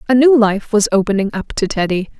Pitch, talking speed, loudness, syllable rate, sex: 215 Hz, 220 wpm, -15 LUFS, 5.9 syllables/s, female